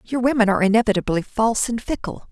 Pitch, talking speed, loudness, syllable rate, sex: 220 Hz, 180 wpm, -20 LUFS, 6.9 syllables/s, female